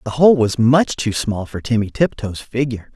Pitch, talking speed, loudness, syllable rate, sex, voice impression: 120 Hz, 205 wpm, -18 LUFS, 5.0 syllables/s, male, masculine, adult-like, tensed, powerful, bright, clear, cool, intellectual, friendly, wild, lively